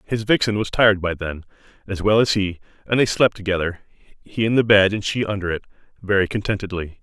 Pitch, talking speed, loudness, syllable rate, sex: 100 Hz, 205 wpm, -20 LUFS, 6.2 syllables/s, male